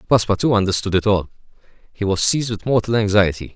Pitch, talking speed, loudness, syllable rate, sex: 105 Hz, 170 wpm, -18 LUFS, 7.0 syllables/s, male